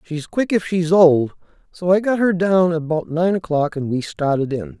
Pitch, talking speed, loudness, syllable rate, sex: 165 Hz, 225 wpm, -18 LUFS, 4.9 syllables/s, male